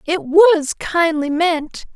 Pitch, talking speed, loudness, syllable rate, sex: 320 Hz, 125 wpm, -16 LUFS, 2.9 syllables/s, female